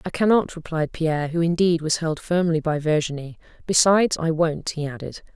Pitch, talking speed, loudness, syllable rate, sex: 165 Hz, 180 wpm, -22 LUFS, 5.3 syllables/s, female